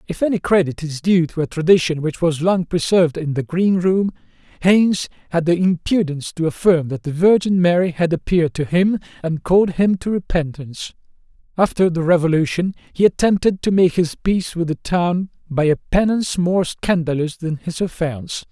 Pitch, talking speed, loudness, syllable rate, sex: 175 Hz, 180 wpm, -18 LUFS, 5.3 syllables/s, male